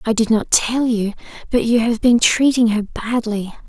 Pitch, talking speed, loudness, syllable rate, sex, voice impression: 225 Hz, 195 wpm, -17 LUFS, 4.6 syllables/s, female, feminine, slightly young, relaxed, weak, soft, raspy, slightly cute, calm, friendly, reassuring, elegant, kind, modest